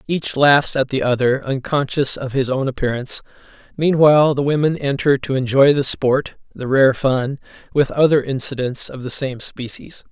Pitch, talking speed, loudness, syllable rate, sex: 135 Hz, 165 wpm, -18 LUFS, 4.9 syllables/s, male